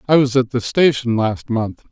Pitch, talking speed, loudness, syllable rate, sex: 120 Hz, 220 wpm, -17 LUFS, 4.7 syllables/s, male